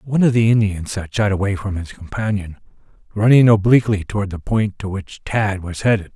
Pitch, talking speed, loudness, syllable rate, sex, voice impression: 100 Hz, 195 wpm, -18 LUFS, 5.6 syllables/s, male, masculine, middle-aged, thick, tensed, powerful, slightly muffled, raspy, slightly calm, mature, slightly friendly, wild, lively, slightly strict